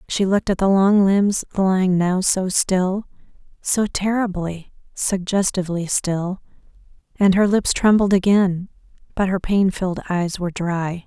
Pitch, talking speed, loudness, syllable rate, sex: 190 Hz, 140 wpm, -19 LUFS, 4.3 syllables/s, female